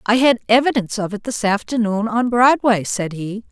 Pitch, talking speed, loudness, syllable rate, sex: 220 Hz, 190 wpm, -18 LUFS, 5.2 syllables/s, female